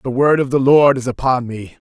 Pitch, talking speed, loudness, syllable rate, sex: 130 Hz, 250 wpm, -15 LUFS, 5.3 syllables/s, male